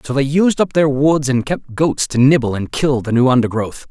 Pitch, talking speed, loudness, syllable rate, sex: 135 Hz, 245 wpm, -15 LUFS, 5.0 syllables/s, male